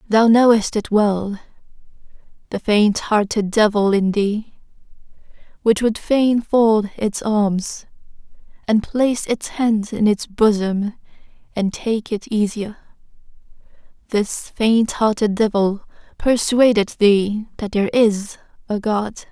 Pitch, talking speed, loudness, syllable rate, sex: 215 Hz, 115 wpm, -18 LUFS, 3.6 syllables/s, female